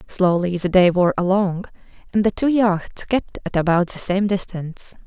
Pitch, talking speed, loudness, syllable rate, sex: 190 Hz, 180 wpm, -19 LUFS, 4.7 syllables/s, female